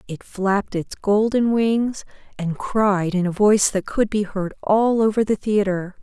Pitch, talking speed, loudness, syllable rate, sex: 205 Hz, 180 wpm, -20 LUFS, 4.2 syllables/s, female